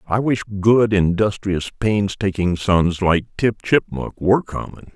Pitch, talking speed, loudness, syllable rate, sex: 100 Hz, 135 wpm, -19 LUFS, 3.8 syllables/s, male